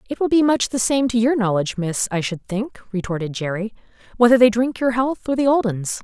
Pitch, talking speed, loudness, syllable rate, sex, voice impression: 230 Hz, 240 wpm, -19 LUFS, 5.8 syllables/s, female, feminine, slightly young, slightly clear, fluent, refreshing, calm, slightly lively